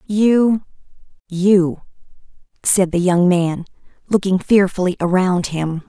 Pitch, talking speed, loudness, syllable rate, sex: 185 Hz, 90 wpm, -16 LUFS, 3.6 syllables/s, female